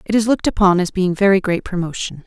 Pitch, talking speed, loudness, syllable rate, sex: 190 Hz, 240 wpm, -17 LUFS, 6.5 syllables/s, female